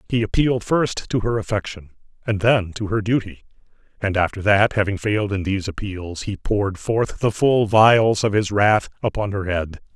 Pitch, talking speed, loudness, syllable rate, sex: 105 Hz, 185 wpm, -20 LUFS, 5.0 syllables/s, male